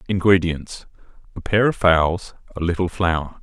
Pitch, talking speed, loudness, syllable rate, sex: 90 Hz, 125 wpm, -20 LUFS, 4.3 syllables/s, male